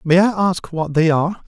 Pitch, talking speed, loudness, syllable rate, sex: 170 Hz, 245 wpm, -17 LUFS, 5.2 syllables/s, male